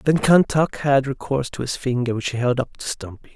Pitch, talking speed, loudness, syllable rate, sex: 130 Hz, 235 wpm, -21 LUFS, 5.5 syllables/s, male